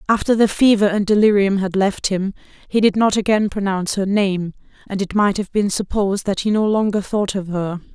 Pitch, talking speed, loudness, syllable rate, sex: 200 Hz, 210 wpm, -18 LUFS, 5.5 syllables/s, female